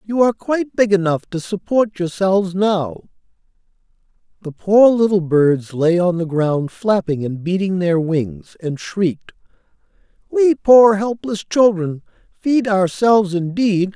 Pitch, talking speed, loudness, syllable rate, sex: 190 Hz, 135 wpm, -17 LUFS, 4.1 syllables/s, male